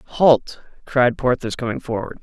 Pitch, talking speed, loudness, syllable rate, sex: 130 Hz, 135 wpm, -19 LUFS, 4.1 syllables/s, male